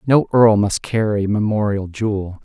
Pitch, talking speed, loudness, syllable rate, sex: 105 Hz, 150 wpm, -17 LUFS, 4.5 syllables/s, male